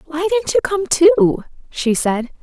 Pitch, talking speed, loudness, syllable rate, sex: 315 Hz, 175 wpm, -16 LUFS, 3.9 syllables/s, female